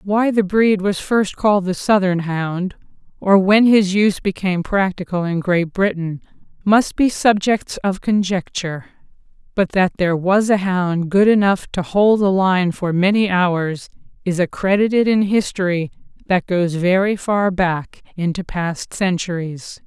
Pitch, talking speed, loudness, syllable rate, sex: 190 Hz, 150 wpm, -18 LUFS, 4.3 syllables/s, female